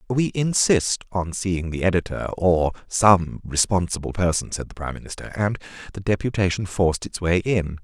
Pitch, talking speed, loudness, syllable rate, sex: 95 Hz, 160 wpm, -22 LUFS, 5.0 syllables/s, male